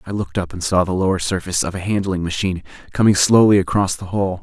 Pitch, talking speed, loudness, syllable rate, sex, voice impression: 95 Hz, 230 wpm, -18 LUFS, 6.7 syllables/s, male, very masculine, adult-like, slightly thick, slightly fluent, cool, slightly wild